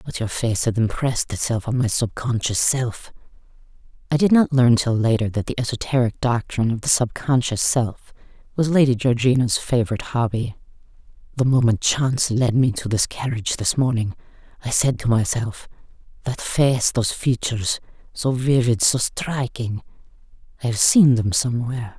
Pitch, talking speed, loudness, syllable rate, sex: 120 Hz, 160 wpm, -20 LUFS, 3.4 syllables/s, female